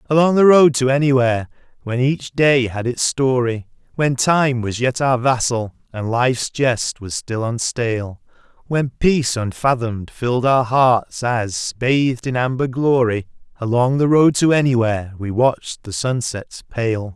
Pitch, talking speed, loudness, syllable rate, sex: 125 Hz, 155 wpm, -18 LUFS, 4.4 syllables/s, male